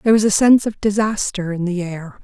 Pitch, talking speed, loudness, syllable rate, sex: 200 Hz, 240 wpm, -17 LUFS, 6.1 syllables/s, female